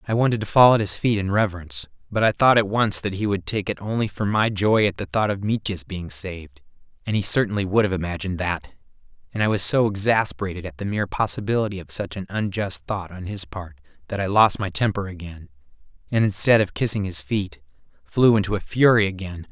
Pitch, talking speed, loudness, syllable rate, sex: 100 Hz, 220 wpm, -22 LUFS, 5.4 syllables/s, male